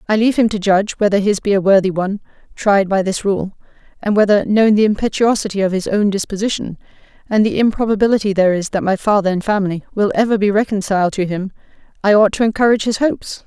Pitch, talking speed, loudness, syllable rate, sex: 205 Hz, 205 wpm, -16 LUFS, 6.8 syllables/s, female